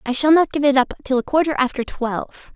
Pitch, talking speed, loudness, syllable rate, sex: 275 Hz, 260 wpm, -19 LUFS, 6.0 syllables/s, female